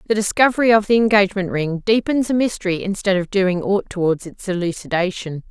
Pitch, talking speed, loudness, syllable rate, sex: 195 Hz, 175 wpm, -18 LUFS, 5.9 syllables/s, female